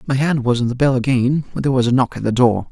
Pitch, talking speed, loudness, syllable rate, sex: 125 Hz, 330 wpm, -17 LUFS, 6.9 syllables/s, male